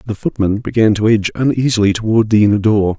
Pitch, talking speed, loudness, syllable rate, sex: 110 Hz, 200 wpm, -14 LUFS, 6.5 syllables/s, male